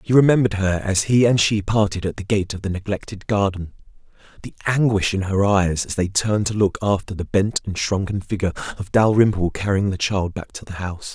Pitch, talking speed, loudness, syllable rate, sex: 100 Hz, 215 wpm, -20 LUFS, 5.8 syllables/s, male